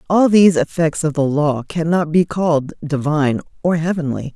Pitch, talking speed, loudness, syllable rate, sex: 160 Hz, 165 wpm, -17 LUFS, 5.2 syllables/s, female